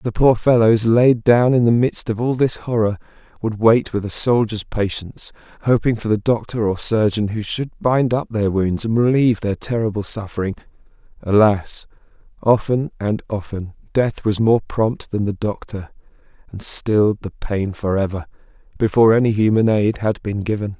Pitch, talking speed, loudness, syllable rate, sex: 110 Hz, 165 wpm, -18 LUFS, 4.9 syllables/s, male